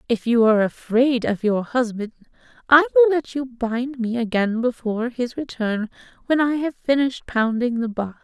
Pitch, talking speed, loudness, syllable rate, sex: 240 Hz, 175 wpm, -21 LUFS, 5.1 syllables/s, female